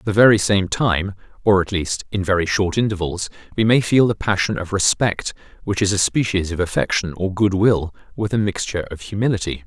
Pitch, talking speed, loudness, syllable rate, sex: 100 Hz, 205 wpm, -19 LUFS, 5.5 syllables/s, male